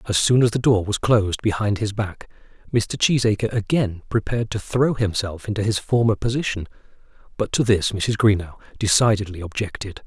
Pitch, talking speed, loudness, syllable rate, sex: 105 Hz, 165 wpm, -21 LUFS, 5.4 syllables/s, male